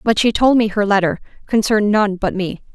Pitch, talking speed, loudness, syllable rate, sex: 205 Hz, 220 wpm, -16 LUFS, 5.6 syllables/s, female